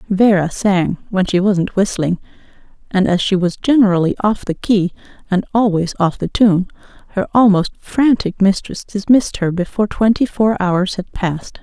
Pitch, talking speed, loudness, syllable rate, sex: 195 Hz, 150 wpm, -16 LUFS, 4.9 syllables/s, female